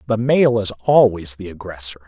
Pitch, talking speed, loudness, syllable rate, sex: 105 Hz, 175 wpm, -17 LUFS, 4.9 syllables/s, male